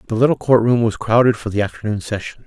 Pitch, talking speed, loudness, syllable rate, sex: 115 Hz, 245 wpm, -17 LUFS, 6.6 syllables/s, male